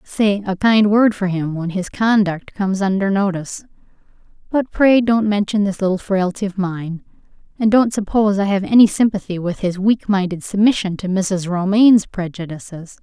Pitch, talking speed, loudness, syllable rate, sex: 195 Hz, 165 wpm, -17 LUFS, 5.1 syllables/s, female